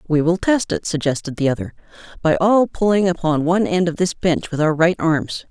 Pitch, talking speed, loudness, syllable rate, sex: 170 Hz, 220 wpm, -18 LUFS, 5.3 syllables/s, female